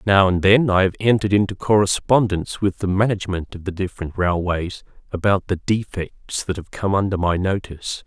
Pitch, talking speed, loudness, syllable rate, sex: 95 Hz, 180 wpm, -20 LUFS, 5.5 syllables/s, male